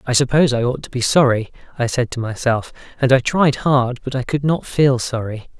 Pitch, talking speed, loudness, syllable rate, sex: 130 Hz, 225 wpm, -18 LUFS, 5.4 syllables/s, male